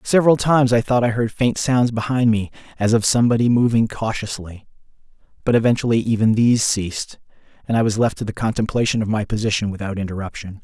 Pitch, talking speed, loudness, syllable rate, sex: 110 Hz, 180 wpm, -19 LUFS, 6.3 syllables/s, male